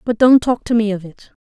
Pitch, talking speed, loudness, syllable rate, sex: 220 Hz, 295 wpm, -15 LUFS, 5.6 syllables/s, female